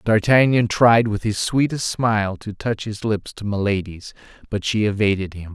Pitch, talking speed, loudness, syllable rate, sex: 105 Hz, 175 wpm, -20 LUFS, 4.7 syllables/s, male